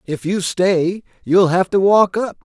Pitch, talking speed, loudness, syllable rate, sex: 185 Hz, 190 wpm, -16 LUFS, 3.9 syllables/s, male